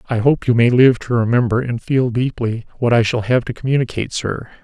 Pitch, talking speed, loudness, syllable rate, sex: 120 Hz, 220 wpm, -17 LUFS, 5.7 syllables/s, male